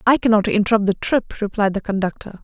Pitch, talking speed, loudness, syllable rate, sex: 210 Hz, 195 wpm, -19 LUFS, 6.3 syllables/s, female